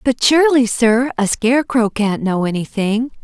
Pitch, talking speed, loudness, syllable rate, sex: 235 Hz, 150 wpm, -16 LUFS, 4.7 syllables/s, female